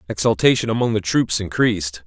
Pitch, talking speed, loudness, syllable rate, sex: 105 Hz, 145 wpm, -19 LUFS, 5.9 syllables/s, male